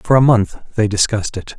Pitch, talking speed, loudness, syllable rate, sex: 110 Hz, 225 wpm, -16 LUFS, 5.8 syllables/s, male